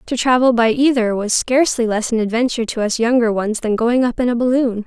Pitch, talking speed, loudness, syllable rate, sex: 235 Hz, 235 wpm, -16 LUFS, 5.9 syllables/s, female